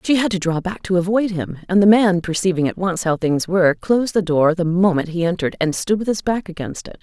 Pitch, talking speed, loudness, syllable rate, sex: 185 Hz, 265 wpm, -18 LUFS, 5.9 syllables/s, female